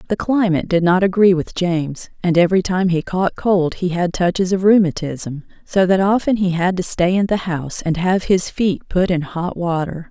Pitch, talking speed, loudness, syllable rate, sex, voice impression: 180 Hz, 215 wpm, -17 LUFS, 5.0 syllables/s, female, very feminine, adult-like, slightly middle-aged, slightly thin, slightly tensed, slightly weak, slightly bright, slightly soft, clear, slightly fluent, cute, very intellectual, refreshing, sincere, very calm, very friendly, reassuring, elegant, sweet, slightly lively, slightly kind